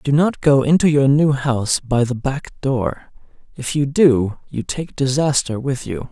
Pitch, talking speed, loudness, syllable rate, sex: 135 Hz, 185 wpm, -18 LUFS, 4.1 syllables/s, male